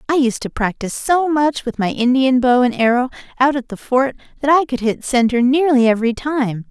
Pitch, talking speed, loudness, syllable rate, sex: 255 Hz, 215 wpm, -17 LUFS, 5.4 syllables/s, female